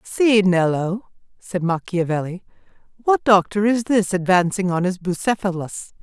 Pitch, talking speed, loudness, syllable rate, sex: 190 Hz, 120 wpm, -19 LUFS, 4.4 syllables/s, female